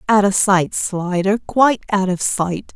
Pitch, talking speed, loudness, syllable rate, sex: 195 Hz, 175 wpm, -17 LUFS, 4.2 syllables/s, female